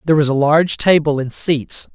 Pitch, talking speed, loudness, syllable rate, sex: 150 Hz, 215 wpm, -15 LUFS, 5.6 syllables/s, male